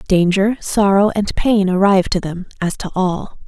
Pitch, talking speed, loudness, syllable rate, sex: 195 Hz, 175 wpm, -16 LUFS, 4.7 syllables/s, female